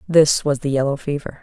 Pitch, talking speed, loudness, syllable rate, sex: 145 Hz, 210 wpm, -19 LUFS, 5.5 syllables/s, female